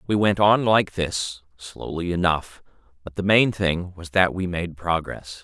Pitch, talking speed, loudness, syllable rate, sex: 90 Hz, 175 wpm, -22 LUFS, 4.0 syllables/s, male